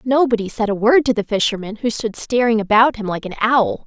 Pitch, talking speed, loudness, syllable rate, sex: 225 Hz, 235 wpm, -17 LUFS, 5.7 syllables/s, female